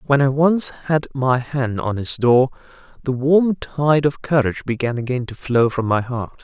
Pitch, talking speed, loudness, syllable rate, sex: 130 Hz, 195 wpm, -19 LUFS, 4.4 syllables/s, male